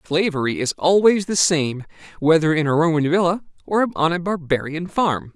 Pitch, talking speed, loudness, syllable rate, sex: 165 Hz, 170 wpm, -19 LUFS, 5.1 syllables/s, male